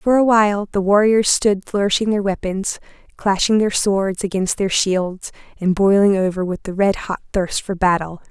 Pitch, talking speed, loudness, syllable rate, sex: 195 Hz, 180 wpm, -18 LUFS, 4.7 syllables/s, female